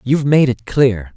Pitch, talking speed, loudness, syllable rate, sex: 125 Hz, 205 wpm, -15 LUFS, 4.8 syllables/s, male